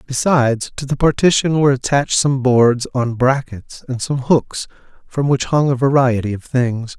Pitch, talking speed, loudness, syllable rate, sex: 130 Hz, 170 wpm, -16 LUFS, 4.7 syllables/s, male